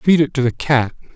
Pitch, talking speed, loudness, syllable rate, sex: 135 Hz, 260 wpm, -17 LUFS, 5.4 syllables/s, male